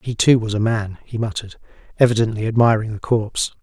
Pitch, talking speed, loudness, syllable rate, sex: 110 Hz, 180 wpm, -19 LUFS, 6.3 syllables/s, male